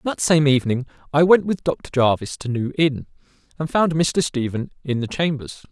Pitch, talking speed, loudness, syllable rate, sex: 145 Hz, 190 wpm, -20 LUFS, 5.0 syllables/s, male